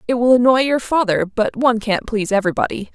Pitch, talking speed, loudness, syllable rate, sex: 225 Hz, 205 wpm, -17 LUFS, 6.9 syllables/s, female